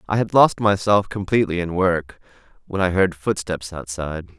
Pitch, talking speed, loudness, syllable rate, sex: 90 Hz, 165 wpm, -20 LUFS, 5.1 syllables/s, male